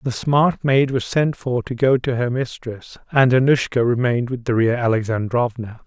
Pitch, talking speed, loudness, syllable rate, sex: 125 Hz, 175 wpm, -19 LUFS, 4.8 syllables/s, male